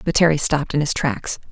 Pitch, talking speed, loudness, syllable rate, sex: 150 Hz, 240 wpm, -19 LUFS, 6.1 syllables/s, female